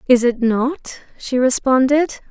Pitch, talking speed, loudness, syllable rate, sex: 260 Hz, 130 wpm, -16 LUFS, 3.9 syllables/s, female